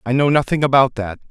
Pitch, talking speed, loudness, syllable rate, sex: 130 Hz, 230 wpm, -16 LUFS, 6.3 syllables/s, male